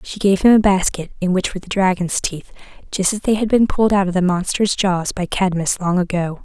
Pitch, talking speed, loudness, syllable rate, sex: 190 Hz, 240 wpm, -17 LUFS, 5.6 syllables/s, female